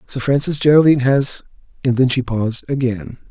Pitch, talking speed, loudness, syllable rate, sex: 130 Hz, 165 wpm, -16 LUFS, 5.7 syllables/s, male